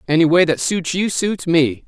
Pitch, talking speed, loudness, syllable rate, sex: 170 Hz, 225 wpm, -17 LUFS, 4.7 syllables/s, male